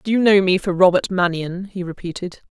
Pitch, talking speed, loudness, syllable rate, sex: 185 Hz, 215 wpm, -18 LUFS, 5.4 syllables/s, female